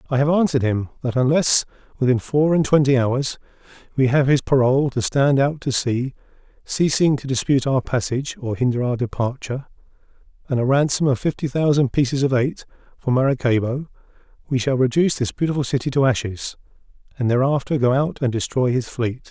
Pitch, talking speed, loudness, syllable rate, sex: 135 Hz, 175 wpm, -20 LUFS, 5.8 syllables/s, male